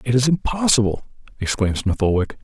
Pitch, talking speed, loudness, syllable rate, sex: 115 Hz, 150 wpm, -20 LUFS, 6.2 syllables/s, male